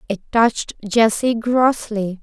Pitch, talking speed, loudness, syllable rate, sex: 225 Hz, 110 wpm, -18 LUFS, 4.0 syllables/s, female